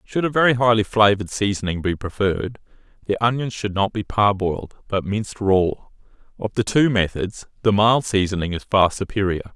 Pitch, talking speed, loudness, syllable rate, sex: 105 Hz, 170 wpm, -20 LUFS, 5.6 syllables/s, male